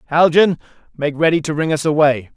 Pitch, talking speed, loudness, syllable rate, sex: 155 Hz, 180 wpm, -16 LUFS, 5.7 syllables/s, male